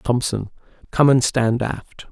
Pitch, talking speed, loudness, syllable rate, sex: 125 Hz, 140 wpm, -19 LUFS, 3.6 syllables/s, male